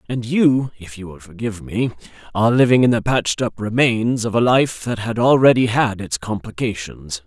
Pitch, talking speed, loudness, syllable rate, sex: 115 Hz, 175 wpm, -18 LUFS, 5.1 syllables/s, male